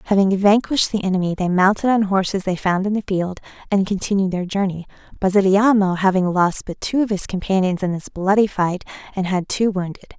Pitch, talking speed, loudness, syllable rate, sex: 195 Hz, 195 wpm, -19 LUFS, 5.7 syllables/s, female